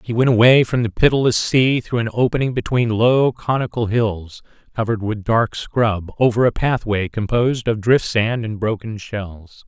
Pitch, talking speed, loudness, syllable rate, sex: 115 Hz, 175 wpm, -18 LUFS, 4.7 syllables/s, male